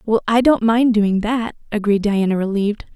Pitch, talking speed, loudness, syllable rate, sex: 215 Hz, 185 wpm, -17 LUFS, 5.1 syllables/s, female